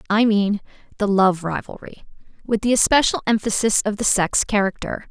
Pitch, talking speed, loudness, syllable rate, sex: 210 Hz, 155 wpm, -19 LUFS, 5.2 syllables/s, female